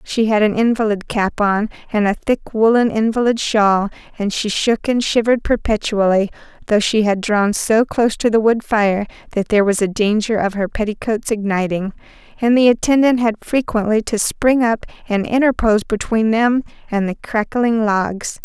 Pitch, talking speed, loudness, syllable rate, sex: 220 Hz, 170 wpm, -17 LUFS, 4.9 syllables/s, female